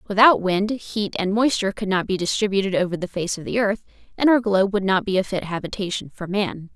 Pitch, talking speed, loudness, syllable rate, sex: 200 Hz, 230 wpm, -21 LUFS, 6.2 syllables/s, female